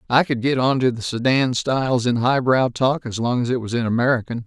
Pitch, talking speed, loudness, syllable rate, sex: 125 Hz, 230 wpm, -20 LUFS, 5.6 syllables/s, male